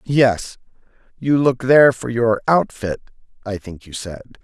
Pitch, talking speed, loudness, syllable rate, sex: 120 Hz, 150 wpm, -18 LUFS, 4.3 syllables/s, male